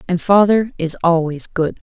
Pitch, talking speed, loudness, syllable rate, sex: 180 Hz, 155 wpm, -16 LUFS, 4.5 syllables/s, female